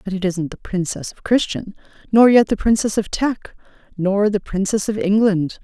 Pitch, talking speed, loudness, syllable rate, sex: 200 Hz, 190 wpm, -18 LUFS, 4.9 syllables/s, female